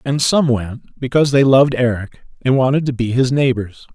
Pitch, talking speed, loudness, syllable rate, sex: 130 Hz, 200 wpm, -16 LUFS, 5.4 syllables/s, male